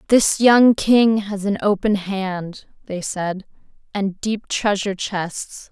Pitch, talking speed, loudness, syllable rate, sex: 200 Hz, 135 wpm, -19 LUFS, 3.4 syllables/s, female